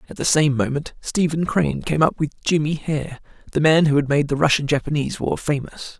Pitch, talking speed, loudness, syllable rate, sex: 150 Hz, 210 wpm, -20 LUFS, 5.7 syllables/s, male